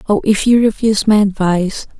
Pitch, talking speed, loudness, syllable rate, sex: 205 Hz, 180 wpm, -14 LUFS, 5.9 syllables/s, female